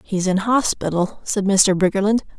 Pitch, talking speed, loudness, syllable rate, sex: 195 Hz, 150 wpm, -18 LUFS, 4.7 syllables/s, female